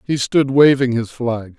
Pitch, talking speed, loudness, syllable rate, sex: 125 Hz, 190 wpm, -16 LUFS, 4.1 syllables/s, male